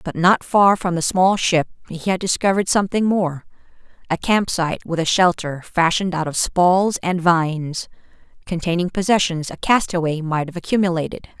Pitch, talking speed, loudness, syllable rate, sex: 175 Hz, 155 wpm, -19 LUFS, 5.3 syllables/s, female